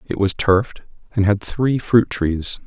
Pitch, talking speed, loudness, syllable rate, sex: 105 Hz, 180 wpm, -19 LUFS, 4.1 syllables/s, male